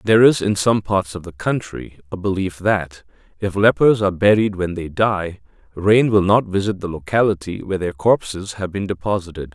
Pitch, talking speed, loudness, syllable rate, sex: 95 Hz, 190 wpm, -18 LUFS, 5.2 syllables/s, male